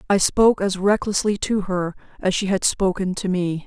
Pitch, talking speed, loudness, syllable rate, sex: 190 Hz, 195 wpm, -21 LUFS, 4.9 syllables/s, female